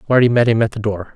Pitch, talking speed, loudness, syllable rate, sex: 110 Hz, 310 wpm, -16 LUFS, 7.2 syllables/s, male